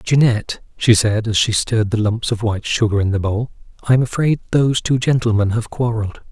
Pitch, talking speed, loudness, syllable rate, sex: 115 Hz, 200 wpm, -17 LUFS, 5.7 syllables/s, male